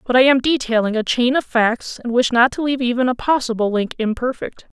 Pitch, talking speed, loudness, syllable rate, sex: 245 Hz, 225 wpm, -18 LUFS, 5.8 syllables/s, female